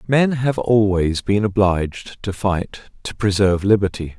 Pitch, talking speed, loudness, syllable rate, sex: 100 Hz, 145 wpm, -19 LUFS, 4.5 syllables/s, male